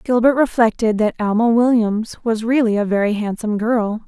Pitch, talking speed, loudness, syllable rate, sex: 225 Hz, 160 wpm, -17 LUFS, 5.2 syllables/s, female